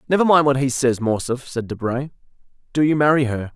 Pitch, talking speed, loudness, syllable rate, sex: 135 Hz, 205 wpm, -19 LUFS, 5.8 syllables/s, male